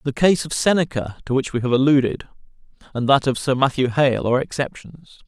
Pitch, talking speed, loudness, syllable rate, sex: 135 Hz, 195 wpm, -20 LUFS, 4.8 syllables/s, male